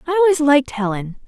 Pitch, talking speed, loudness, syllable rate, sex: 280 Hz, 190 wpm, -17 LUFS, 7.0 syllables/s, female